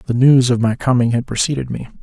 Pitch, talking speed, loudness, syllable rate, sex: 125 Hz, 235 wpm, -16 LUFS, 6.3 syllables/s, male